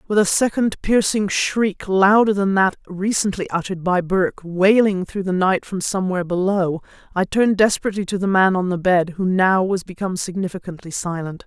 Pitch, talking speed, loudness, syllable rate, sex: 190 Hz, 180 wpm, -19 LUFS, 5.4 syllables/s, female